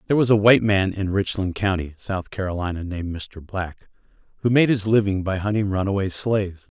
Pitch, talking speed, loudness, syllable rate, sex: 100 Hz, 185 wpm, -22 LUFS, 5.8 syllables/s, male